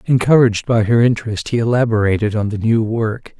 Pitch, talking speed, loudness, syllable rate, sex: 115 Hz, 175 wpm, -16 LUFS, 5.9 syllables/s, male